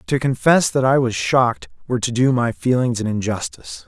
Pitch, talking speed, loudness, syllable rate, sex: 120 Hz, 200 wpm, -18 LUFS, 5.6 syllables/s, male